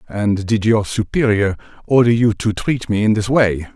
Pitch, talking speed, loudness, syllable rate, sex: 110 Hz, 190 wpm, -17 LUFS, 4.6 syllables/s, male